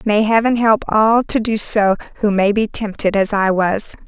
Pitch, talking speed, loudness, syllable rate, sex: 210 Hz, 205 wpm, -16 LUFS, 4.5 syllables/s, female